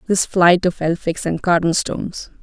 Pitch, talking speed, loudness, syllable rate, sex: 175 Hz, 150 wpm, -18 LUFS, 4.7 syllables/s, female